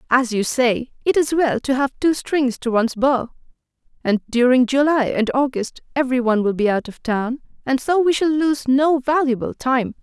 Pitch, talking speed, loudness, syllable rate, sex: 260 Hz, 190 wpm, -19 LUFS, 4.8 syllables/s, female